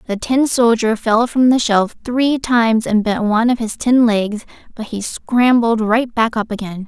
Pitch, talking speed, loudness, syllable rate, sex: 230 Hz, 200 wpm, -16 LUFS, 4.4 syllables/s, female